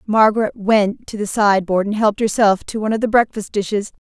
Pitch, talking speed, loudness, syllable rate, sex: 210 Hz, 220 wpm, -17 LUFS, 5.8 syllables/s, female